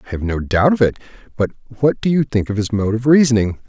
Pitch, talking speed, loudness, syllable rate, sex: 115 Hz, 260 wpm, -17 LUFS, 6.1 syllables/s, male